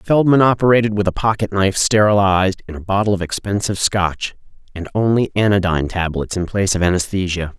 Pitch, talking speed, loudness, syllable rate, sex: 100 Hz, 160 wpm, -17 LUFS, 6.1 syllables/s, male